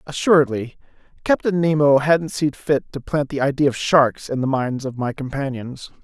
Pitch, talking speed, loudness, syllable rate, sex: 140 Hz, 180 wpm, -20 LUFS, 4.9 syllables/s, male